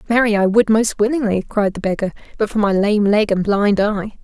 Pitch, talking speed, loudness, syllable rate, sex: 210 Hz, 225 wpm, -17 LUFS, 5.4 syllables/s, female